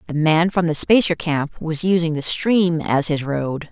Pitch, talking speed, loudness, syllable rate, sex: 160 Hz, 210 wpm, -19 LUFS, 4.3 syllables/s, female